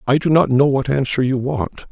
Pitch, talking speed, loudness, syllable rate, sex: 135 Hz, 250 wpm, -17 LUFS, 5.2 syllables/s, male